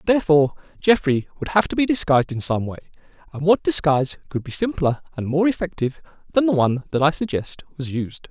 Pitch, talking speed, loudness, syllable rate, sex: 160 Hz, 195 wpm, -21 LUFS, 6.4 syllables/s, male